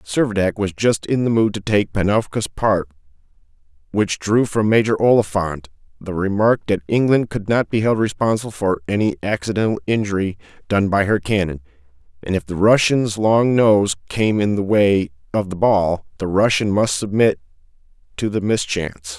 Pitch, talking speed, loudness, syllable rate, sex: 100 Hz, 165 wpm, -18 LUFS, 5.0 syllables/s, male